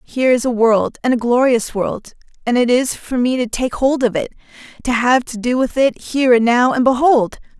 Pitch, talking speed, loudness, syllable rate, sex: 245 Hz, 230 wpm, -16 LUFS, 5.2 syllables/s, female